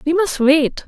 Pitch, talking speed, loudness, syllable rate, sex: 310 Hz, 205 wpm, -16 LUFS, 4.1 syllables/s, female